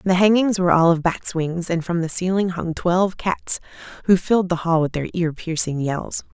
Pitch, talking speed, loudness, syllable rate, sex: 175 Hz, 215 wpm, -20 LUFS, 5.2 syllables/s, female